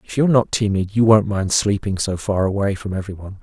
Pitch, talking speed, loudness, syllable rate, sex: 100 Hz, 245 wpm, -19 LUFS, 6.3 syllables/s, male